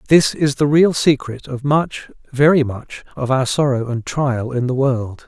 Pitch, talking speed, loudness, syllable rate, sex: 135 Hz, 195 wpm, -17 LUFS, 4.2 syllables/s, male